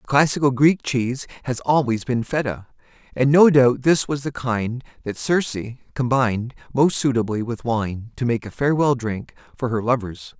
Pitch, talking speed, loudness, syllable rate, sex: 125 Hz, 175 wpm, -21 LUFS, 5.0 syllables/s, male